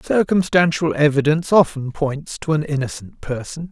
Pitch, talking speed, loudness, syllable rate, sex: 150 Hz, 130 wpm, -19 LUFS, 4.9 syllables/s, male